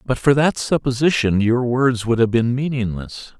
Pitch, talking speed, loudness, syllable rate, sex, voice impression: 125 Hz, 175 wpm, -18 LUFS, 4.6 syllables/s, male, masculine, very adult-like, very middle-aged, very thick, very tensed, powerful, bright, slightly hard, clear, slightly fluent, very cool, very intellectual, slightly refreshing, sincere, very calm, very mature, friendly, reassuring, very unique, very wild, sweet, lively, kind